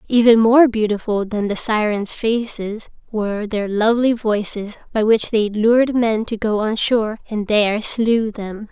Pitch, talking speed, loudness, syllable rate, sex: 220 Hz, 165 wpm, -18 LUFS, 4.4 syllables/s, female